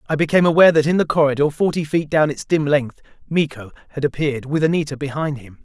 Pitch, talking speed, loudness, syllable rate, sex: 150 Hz, 215 wpm, -18 LUFS, 6.7 syllables/s, male